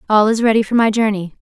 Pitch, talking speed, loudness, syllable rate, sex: 215 Hz, 250 wpm, -15 LUFS, 6.6 syllables/s, female